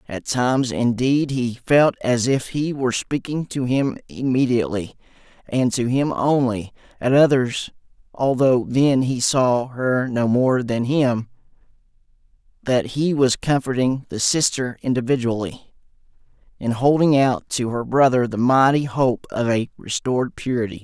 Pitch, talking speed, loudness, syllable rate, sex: 125 Hz, 135 wpm, -20 LUFS, 4.4 syllables/s, male